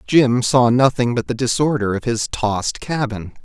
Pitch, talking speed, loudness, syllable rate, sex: 120 Hz, 175 wpm, -18 LUFS, 4.7 syllables/s, male